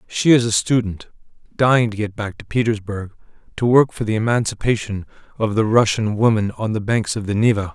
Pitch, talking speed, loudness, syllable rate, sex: 110 Hz, 195 wpm, -19 LUFS, 5.6 syllables/s, male